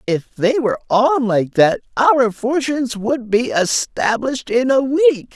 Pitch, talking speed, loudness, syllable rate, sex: 245 Hz, 155 wpm, -17 LUFS, 4.2 syllables/s, male